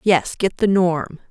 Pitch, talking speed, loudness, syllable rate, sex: 180 Hz, 185 wpm, -19 LUFS, 3.7 syllables/s, female